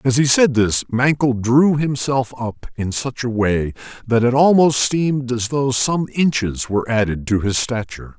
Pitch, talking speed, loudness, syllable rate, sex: 125 Hz, 185 wpm, -18 LUFS, 4.5 syllables/s, male